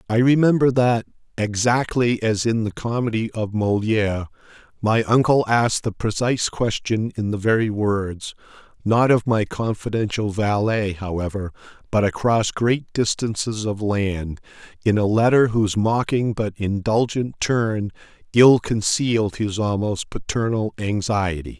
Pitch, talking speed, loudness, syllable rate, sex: 110 Hz, 125 wpm, -21 LUFS, 4.4 syllables/s, male